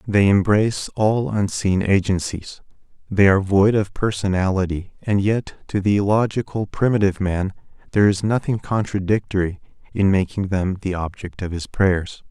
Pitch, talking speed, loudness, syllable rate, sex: 100 Hz, 140 wpm, -20 LUFS, 5.0 syllables/s, male